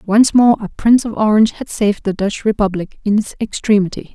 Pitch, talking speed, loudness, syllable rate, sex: 215 Hz, 205 wpm, -15 LUFS, 6.0 syllables/s, female